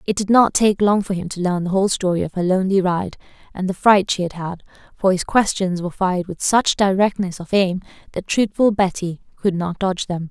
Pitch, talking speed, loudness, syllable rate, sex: 190 Hz, 225 wpm, -19 LUFS, 5.6 syllables/s, female